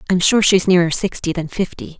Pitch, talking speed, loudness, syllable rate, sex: 180 Hz, 210 wpm, -16 LUFS, 5.7 syllables/s, female